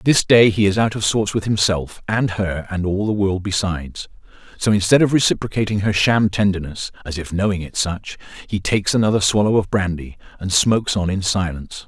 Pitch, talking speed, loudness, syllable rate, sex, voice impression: 100 Hz, 185 wpm, -18 LUFS, 5.5 syllables/s, male, masculine, middle-aged, tensed, powerful, slightly hard, clear, fluent, slightly cool, intellectual, sincere, unique, slightly wild, slightly strict, slightly sharp